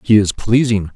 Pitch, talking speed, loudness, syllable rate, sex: 105 Hz, 190 wpm, -15 LUFS, 4.8 syllables/s, male